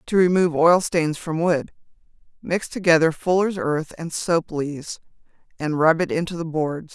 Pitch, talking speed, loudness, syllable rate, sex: 165 Hz, 155 wpm, -21 LUFS, 4.5 syllables/s, female